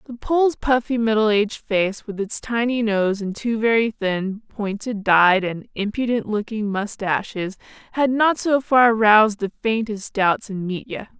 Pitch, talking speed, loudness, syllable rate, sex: 215 Hz, 160 wpm, -20 LUFS, 4.4 syllables/s, female